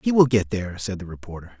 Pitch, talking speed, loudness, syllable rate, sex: 100 Hz, 265 wpm, -22 LUFS, 6.7 syllables/s, male